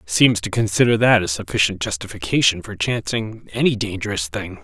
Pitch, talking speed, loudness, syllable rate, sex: 105 Hz, 155 wpm, -19 LUFS, 5.4 syllables/s, male